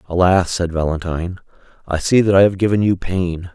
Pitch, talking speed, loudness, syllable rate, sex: 90 Hz, 185 wpm, -17 LUFS, 5.5 syllables/s, male